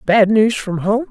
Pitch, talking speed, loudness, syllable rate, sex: 215 Hz, 220 wpm, -15 LUFS, 4.1 syllables/s, female